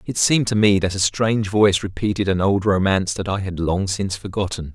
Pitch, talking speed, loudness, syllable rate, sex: 100 Hz, 225 wpm, -19 LUFS, 6.1 syllables/s, male